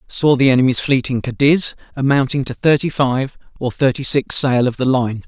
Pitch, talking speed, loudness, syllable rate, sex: 130 Hz, 195 wpm, -16 LUFS, 5.1 syllables/s, male